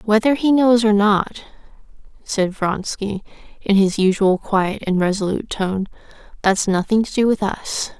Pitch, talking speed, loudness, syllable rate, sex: 205 Hz, 150 wpm, -18 LUFS, 4.4 syllables/s, female